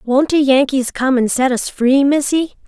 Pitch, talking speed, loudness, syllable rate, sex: 270 Hz, 200 wpm, -15 LUFS, 4.4 syllables/s, female